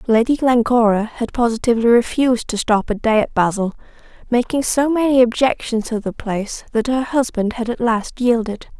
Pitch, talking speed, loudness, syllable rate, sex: 235 Hz, 170 wpm, -18 LUFS, 5.3 syllables/s, female